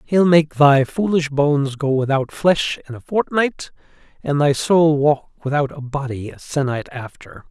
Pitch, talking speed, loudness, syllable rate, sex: 145 Hz, 170 wpm, -18 LUFS, 4.4 syllables/s, male